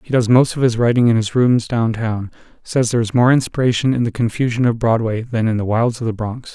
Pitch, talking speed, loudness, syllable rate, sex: 115 Hz, 240 wpm, -17 LUFS, 5.7 syllables/s, male